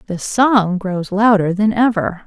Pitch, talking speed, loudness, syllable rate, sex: 200 Hz, 160 wpm, -15 LUFS, 3.9 syllables/s, female